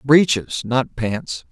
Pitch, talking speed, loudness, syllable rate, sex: 130 Hz, 120 wpm, -20 LUFS, 3.0 syllables/s, male